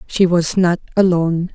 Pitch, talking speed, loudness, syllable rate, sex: 175 Hz, 155 wpm, -16 LUFS, 4.8 syllables/s, female